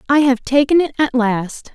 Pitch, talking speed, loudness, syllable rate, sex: 265 Hz, 205 wpm, -16 LUFS, 4.7 syllables/s, female